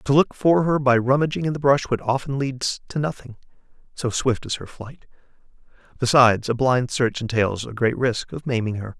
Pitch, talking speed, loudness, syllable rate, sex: 130 Hz, 195 wpm, -21 LUFS, 5.1 syllables/s, male